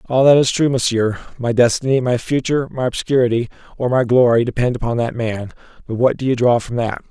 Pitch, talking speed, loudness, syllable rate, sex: 120 Hz, 210 wpm, -17 LUFS, 5.9 syllables/s, male